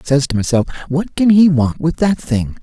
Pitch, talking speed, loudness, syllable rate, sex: 150 Hz, 250 wpm, -15 LUFS, 5.1 syllables/s, male